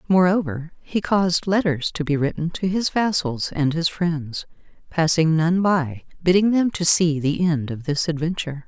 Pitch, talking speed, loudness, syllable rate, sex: 165 Hz, 160 wpm, -21 LUFS, 4.6 syllables/s, female